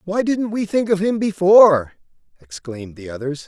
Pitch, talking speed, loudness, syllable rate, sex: 170 Hz, 175 wpm, -17 LUFS, 5.2 syllables/s, male